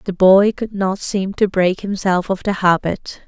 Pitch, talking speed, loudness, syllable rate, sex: 190 Hz, 200 wpm, -17 LUFS, 4.3 syllables/s, female